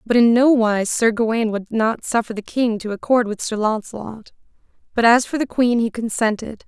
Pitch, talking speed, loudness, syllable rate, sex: 225 Hz, 200 wpm, -19 LUFS, 5.4 syllables/s, female